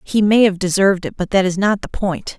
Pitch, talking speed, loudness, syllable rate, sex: 195 Hz, 275 wpm, -16 LUFS, 5.7 syllables/s, female